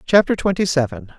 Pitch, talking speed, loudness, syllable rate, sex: 175 Hz, 150 wpm, -18 LUFS, 5.7 syllables/s, female